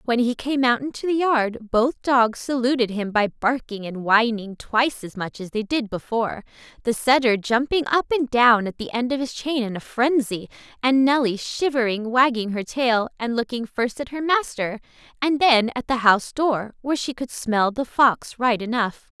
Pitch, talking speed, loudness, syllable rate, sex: 240 Hz, 195 wpm, -22 LUFS, 4.8 syllables/s, female